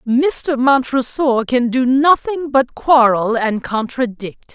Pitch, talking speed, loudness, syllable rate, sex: 255 Hz, 120 wpm, -15 LUFS, 3.5 syllables/s, female